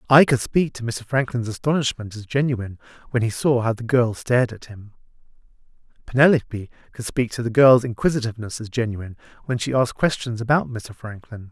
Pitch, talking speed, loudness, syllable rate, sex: 120 Hz, 175 wpm, -21 LUFS, 5.9 syllables/s, male